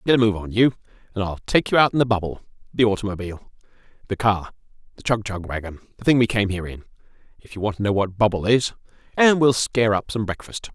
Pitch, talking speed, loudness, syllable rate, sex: 105 Hz, 220 wpm, -21 LUFS, 6.6 syllables/s, male